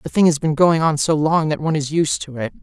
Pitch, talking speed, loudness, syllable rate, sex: 155 Hz, 320 wpm, -18 LUFS, 6.1 syllables/s, female